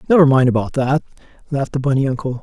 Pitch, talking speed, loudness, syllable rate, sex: 135 Hz, 200 wpm, -17 LUFS, 7.4 syllables/s, male